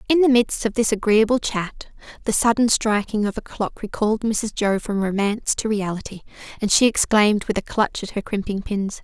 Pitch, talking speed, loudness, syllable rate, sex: 215 Hz, 200 wpm, -21 LUFS, 5.3 syllables/s, female